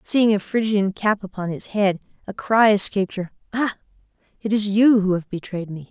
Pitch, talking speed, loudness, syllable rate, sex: 200 Hz, 185 wpm, -20 LUFS, 5.1 syllables/s, female